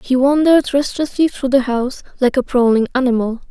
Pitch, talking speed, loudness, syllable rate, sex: 260 Hz, 170 wpm, -16 LUFS, 5.8 syllables/s, female